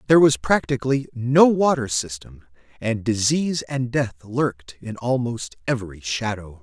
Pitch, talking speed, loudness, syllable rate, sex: 120 Hz, 135 wpm, -22 LUFS, 4.7 syllables/s, male